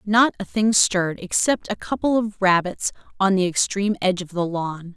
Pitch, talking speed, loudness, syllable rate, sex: 195 Hz, 195 wpm, -21 LUFS, 5.1 syllables/s, female